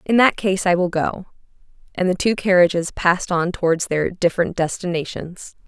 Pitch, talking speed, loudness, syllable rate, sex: 180 Hz, 170 wpm, -19 LUFS, 5.3 syllables/s, female